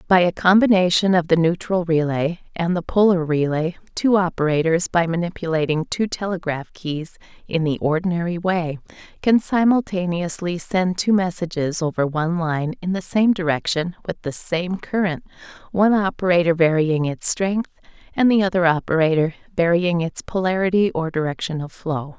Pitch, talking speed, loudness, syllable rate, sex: 175 Hz, 145 wpm, -20 LUFS, 5.1 syllables/s, female